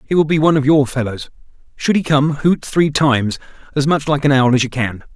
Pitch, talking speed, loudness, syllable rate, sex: 140 Hz, 235 wpm, -16 LUFS, 5.8 syllables/s, male